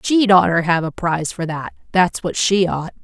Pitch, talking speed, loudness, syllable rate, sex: 175 Hz, 215 wpm, -17 LUFS, 4.9 syllables/s, female